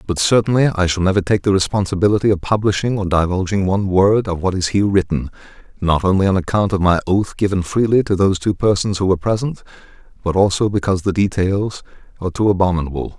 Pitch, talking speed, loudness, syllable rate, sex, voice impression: 95 Hz, 195 wpm, -17 LUFS, 6.5 syllables/s, male, masculine, adult-like, powerful, slightly dark, clear, cool, intellectual, calm, mature, wild, lively, slightly modest